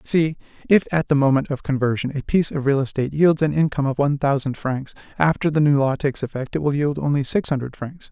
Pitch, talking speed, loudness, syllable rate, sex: 145 Hz, 235 wpm, -21 LUFS, 6.4 syllables/s, male